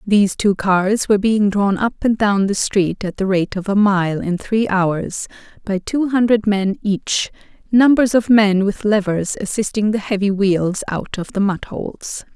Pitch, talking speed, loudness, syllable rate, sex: 200 Hz, 190 wpm, -17 LUFS, 4.3 syllables/s, female